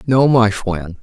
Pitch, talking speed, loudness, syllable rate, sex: 110 Hz, 175 wpm, -15 LUFS, 3.5 syllables/s, male